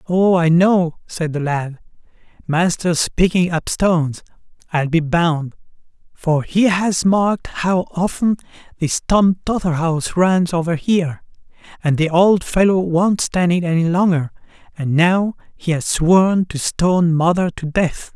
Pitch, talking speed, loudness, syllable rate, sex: 175 Hz, 145 wpm, -17 LUFS, 4.1 syllables/s, male